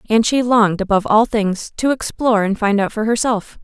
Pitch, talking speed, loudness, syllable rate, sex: 215 Hz, 215 wpm, -17 LUFS, 5.6 syllables/s, female